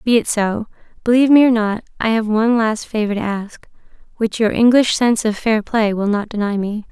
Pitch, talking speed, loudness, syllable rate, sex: 220 Hz, 215 wpm, -17 LUFS, 5.5 syllables/s, female